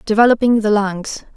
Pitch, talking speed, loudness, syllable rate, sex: 215 Hz, 130 wpm, -15 LUFS, 5.2 syllables/s, female